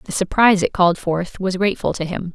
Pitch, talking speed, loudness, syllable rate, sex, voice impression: 185 Hz, 230 wpm, -18 LUFS, 6.3 syllables/s, female, feminine, adult-like, tensed, powerful, slightly hard, slightly muffled, slightly raspy, intellectual, calm, reassuring, elegant, lively, slightly sharp